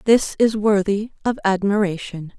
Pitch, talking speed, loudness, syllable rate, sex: 200 Hz, 125 wpm, -20 LUFS, 4.5 syllables/s, female